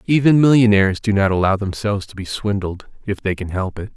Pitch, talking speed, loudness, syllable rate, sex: 105 Hz, 210 wpm, -18 LUFS, 6.0 syllables/s, male